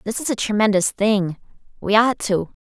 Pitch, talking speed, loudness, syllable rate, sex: 205 Hz, 180 wpm, -19 LUFS, 5.0 syllables/s, female